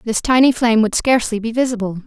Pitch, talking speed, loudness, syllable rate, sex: 230 Hz, 205 wpm, -16 LUFS, 6.7 syllables/s, female